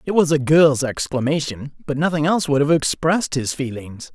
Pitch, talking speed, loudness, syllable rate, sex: 145 Hz, 190 wpm, -19 LUFS, 5.4 syllables/s, male